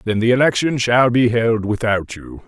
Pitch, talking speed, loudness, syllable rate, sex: 115 Hz, 195 wpm, -16 LUFS, 4.7 syllables/s, male